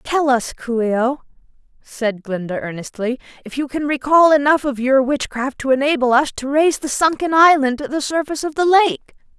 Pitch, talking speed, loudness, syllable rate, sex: 270 Hz, 190 wpm, -17 LUFS, 5.3 syllables/s, female